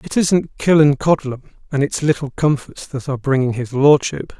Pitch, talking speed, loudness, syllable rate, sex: 140 Hz, 165 wpm, -17 LUFS, 5.4 syllables/s, male